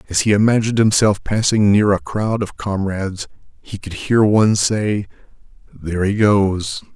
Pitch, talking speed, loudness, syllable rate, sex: 100 Hz, 155 wpm, -17 LUFS, 4.8 syllables/s, male